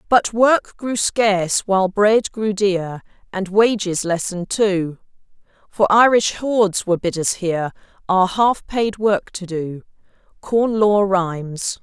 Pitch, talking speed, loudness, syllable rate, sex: 200 Hz, 135 wpm, -18 LUFS, 3.9 syllables/s, female